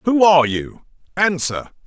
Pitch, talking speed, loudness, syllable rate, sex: 160 Hz, 130 wpm, -17 LUFS, 4.5 syllables/s, male